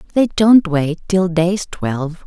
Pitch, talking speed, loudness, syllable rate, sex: 175 Hz, 160 wpm, -16 LUFS, 4.0 syllables/s, female